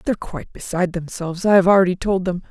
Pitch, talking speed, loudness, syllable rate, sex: 180 Hz, 215 wpm, -19 LUFS, 7.3 syllables/s, female